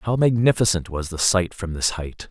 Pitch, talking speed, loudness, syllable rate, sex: 95 Hz, 210 wpm, -21 LUFS, 4.9 syllables/s, male